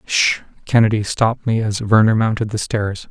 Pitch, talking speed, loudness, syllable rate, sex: 110 Hz, 175 wpm, -17 LUFS, 5.1 syllables/s, male